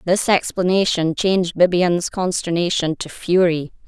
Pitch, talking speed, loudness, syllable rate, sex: 175 Hz, 110 wpm, -18 LUFS, 4.7 syllables/s, female